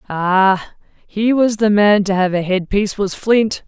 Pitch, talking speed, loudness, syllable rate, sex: 200 Hz, 180 wpm, -15 LUFS, 4.0 syllables/s, female